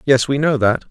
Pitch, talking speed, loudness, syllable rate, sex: 130 Hz, 265 wpm, -16 LUFS, 5.6 syllables/s, male